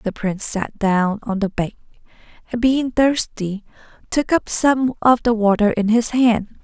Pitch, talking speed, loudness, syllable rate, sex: 225 Hz, 170 wpm, -18 LUFS, 4.2 syllables/s, female